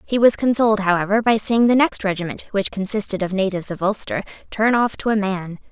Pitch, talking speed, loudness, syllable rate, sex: 205 Hz, 210 wpm, -19 LUFS, 6.0 syllables/s, female